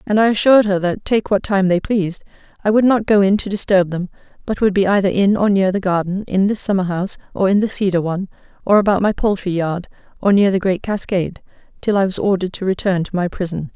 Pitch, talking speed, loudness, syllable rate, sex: 195 Hz, 240 wpm, -17 LUFS, 6.3 syllables/s, female